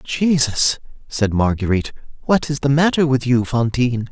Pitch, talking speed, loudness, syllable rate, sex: 130 Hz, 145 wpm, -18 LUFS, 5.0 syllables/s, male